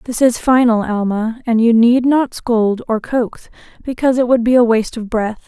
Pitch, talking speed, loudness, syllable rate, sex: 235 Hz, 210 wpm, -15 LUFS, 5.0 syllables/s, female